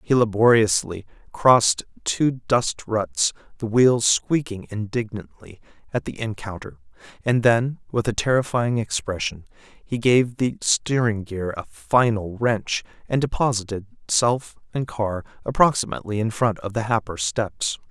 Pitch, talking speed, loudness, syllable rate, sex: 110 Hz, 130 wpm, -22 LUFS, 4.2 syllables/s, male